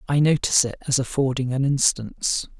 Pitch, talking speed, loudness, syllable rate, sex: 135 Hz, 160 wpm, -21 LUFS, 5.6 syllables/s, male